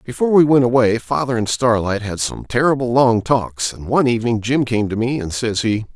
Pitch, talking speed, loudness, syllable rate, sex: 120 Hz, 220 wpm, -17 LUFS, 5.6 syllables/s, male